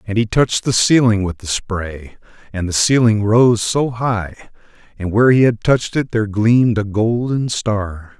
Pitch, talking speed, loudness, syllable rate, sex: 110 Hz, 185 wpm, -16 LUFS, 4.7 syllables/s, male